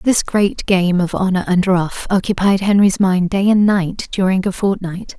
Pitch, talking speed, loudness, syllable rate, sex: 190 Hz, 185 wpm, -16 LUFS, 4.4 syllables/s, female